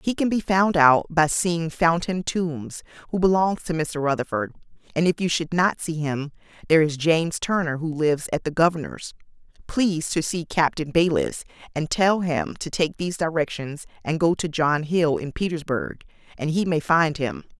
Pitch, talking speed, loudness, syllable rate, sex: 165 Hz, 185 wpm, -23 LUFS, 4.9 syllables/s, female